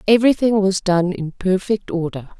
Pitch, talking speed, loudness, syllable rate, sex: 190 Hz, 150 wpm, -18 LUFS, 5.1 syllables/s, female